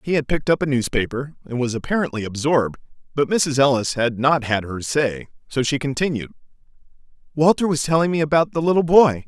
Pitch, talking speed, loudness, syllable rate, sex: 140 Hz, 190 wpm, -20 LUFS, 5.9 syllables/s, male